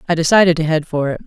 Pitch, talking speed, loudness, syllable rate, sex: 160 Hz, 285 wpm, -15 LUFS, 7.6 syllables/s, female